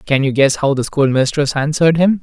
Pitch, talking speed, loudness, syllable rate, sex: 145 Hz, 215 wpm, -15 LUFS, 5.7 syllables/s, male